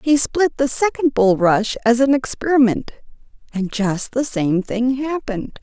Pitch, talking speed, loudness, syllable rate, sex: 245 Hz, 150 wpm, -18 LUFS, 4.2 syllables/s, female